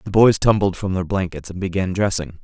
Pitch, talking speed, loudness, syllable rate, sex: 95 Hz, 220 wpm, -19 LUFS, 5.6 syllables/s, male